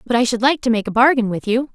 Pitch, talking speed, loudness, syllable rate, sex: 240 Hz, 345 wpm, -17 LUFS, 6.8 syllables/s, female